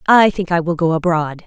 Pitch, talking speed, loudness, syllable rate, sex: 170 Hz, 245 wpm, -16 LUFS, 5.4 syllables/s, female